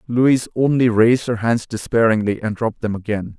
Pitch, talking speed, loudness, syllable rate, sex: 115 Hz, 175 wpm, -18 LUFS, 5.7 syllables/s, male